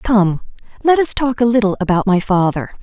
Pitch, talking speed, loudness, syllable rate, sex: 215 Hz, 190 wpm, -15 LUFS, 5.2 syllables/s, female